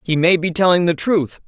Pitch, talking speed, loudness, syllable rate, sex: 170 Hz, 245 wpm, -16 LUFS, 5.3 syllables/s, female